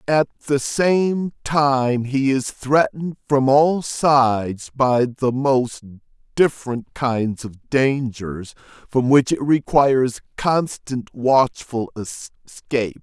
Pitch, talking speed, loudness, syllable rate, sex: 130 Hz, 115 wpm, -19 LUFS, 3.3 syllables/s, male